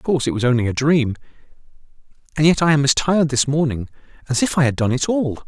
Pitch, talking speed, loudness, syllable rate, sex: 140 Hz, 240 wpm, -18 LUFS, 6.9 syllables/s, male